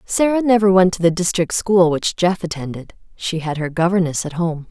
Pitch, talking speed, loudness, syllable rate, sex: 175 Hz, 205 wpm, -17 LUFS, 5.2 syllables/s, female